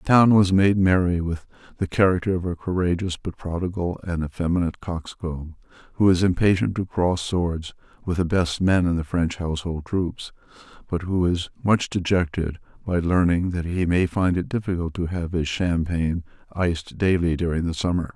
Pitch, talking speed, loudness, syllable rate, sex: 90 Hz, 175 wpm, -23 LUFS, 5.1 syllables/s, male